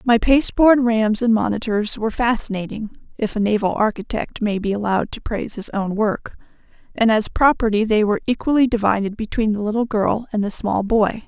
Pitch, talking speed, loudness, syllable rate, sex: 220 Hz, 170 wpm, -19 LUFS, 5.6 syllables/s, female